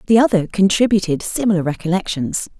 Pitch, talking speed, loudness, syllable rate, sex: 190 Hz, 115 wpm, -17 LUFS, 6.0 syllables/s, female